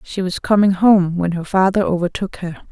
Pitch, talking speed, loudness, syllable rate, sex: 185 Hz, 200 wpm, -17 LUFS, 5.0 syllables/s, female